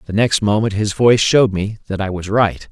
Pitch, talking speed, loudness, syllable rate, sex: 105 Hz, 245 wpm, -16 LUFS, 5.7 syllables/s, male